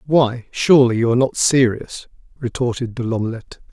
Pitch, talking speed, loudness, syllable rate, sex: 120 Hz, 145 wpm, -17 LUFS, 5.6 syllables/s, male